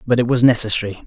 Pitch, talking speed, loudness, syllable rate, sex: 115 Hz, 225 wpm, -16 LUFS, 7.4 syllables/s, male